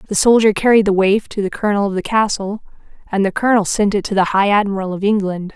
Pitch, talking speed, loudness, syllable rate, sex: 205 Hz, 240 wpm, -16 LUFS, 6.3 syllables/s, female